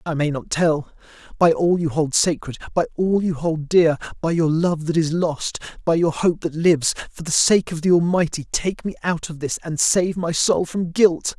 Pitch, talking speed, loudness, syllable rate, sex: 165 Hz, 200 wpm, -20 LUFS, 4.8 syllables/s, male